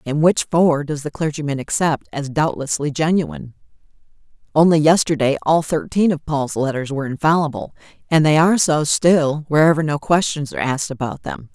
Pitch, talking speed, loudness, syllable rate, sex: 150 Hz, 160 wpm, -18 LUFS, 5.4 syllables/s, female